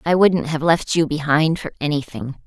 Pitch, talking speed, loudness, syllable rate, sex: 150 Hz, 195 wpm, -19 LUFS, 4.8 syllables/s, female